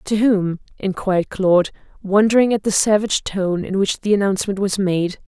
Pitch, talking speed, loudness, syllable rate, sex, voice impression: 195 Hz, 170 wpm, -18 LUFS, 5.4 syllables/s, female, feminine, slightly gender-neutral, slightly young, adult-like, slightly thin, slightly tensed, slightly powerful, slightly bright, hard, clear, fluent, slightly cool, intellectual, refreshing, slightly sincere, calm, slightly friendly, reassuring, elegant, slightly strict